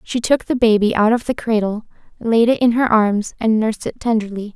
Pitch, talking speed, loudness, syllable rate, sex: 225 Hz, 225 wpm, -17 LUFS, 5.4 syllables/s, female